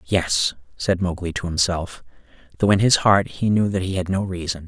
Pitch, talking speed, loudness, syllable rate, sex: 90 Hz, 205 wpm, -21 LUFS, 5.0 syllables/s, male